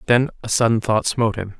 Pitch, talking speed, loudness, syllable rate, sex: 110 Hz, 225 wpm, -19 LUFS, 6.3 syllables/s, male